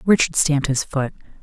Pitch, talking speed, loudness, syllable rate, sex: 145 Hz, 170 wpm, -20 LUFS, 5.8 syllables/s, female